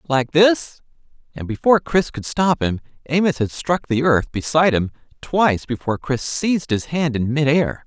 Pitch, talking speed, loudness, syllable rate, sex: 145 Hz, 175 wpm, -19 LUFS, 4.9 syllables/s, male